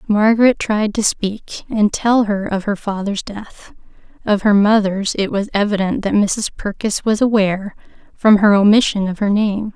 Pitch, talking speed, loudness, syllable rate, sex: 205 Hz, 170 wpm, -16 LUFS, 4.5 syllables/s, female